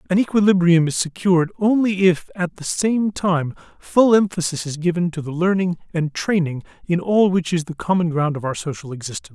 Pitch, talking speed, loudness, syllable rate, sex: 175 Hz, 195 wpm, -19 LUFS, 5.5 syllables/s, male